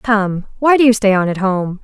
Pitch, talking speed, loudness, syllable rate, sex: 210 Hz, 260 wpm, -14 LUFS, 4.8 syllables/s, female